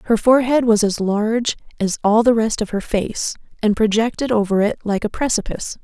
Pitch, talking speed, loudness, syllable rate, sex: 220 Hz, 195 wpm, -18 LUFS, 5.6 syllables/s, female